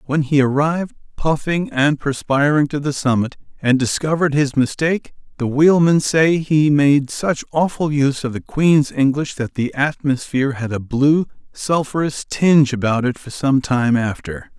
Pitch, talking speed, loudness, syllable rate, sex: 140 Hz, 160 wpm, -17 LUFS, 4.7 syllables/s, male